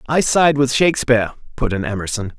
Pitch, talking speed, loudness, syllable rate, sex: 125 Hz, 175 wpm, -17 LUFS, 6.0 syllables/s, male